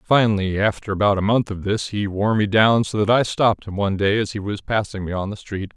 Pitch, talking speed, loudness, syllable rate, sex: 105 Hz, 270 wpm, -20 LUFS, 5.9 syllables/s, male